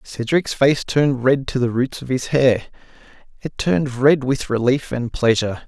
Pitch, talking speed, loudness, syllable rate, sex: 130 Hz, 180 wpm, -19 LUFS, 4.9 syllables/s, male